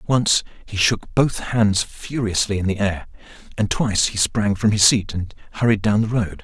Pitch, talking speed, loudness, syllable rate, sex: 105 Hz, 195 wpm, -20 LUFS, 4.7 syllables/s, male